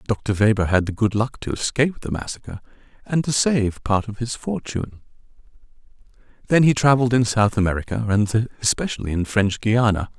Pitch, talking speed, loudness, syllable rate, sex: 115 Hz, 165 wpm, -21 LUFS, 5.5 syllables/s, male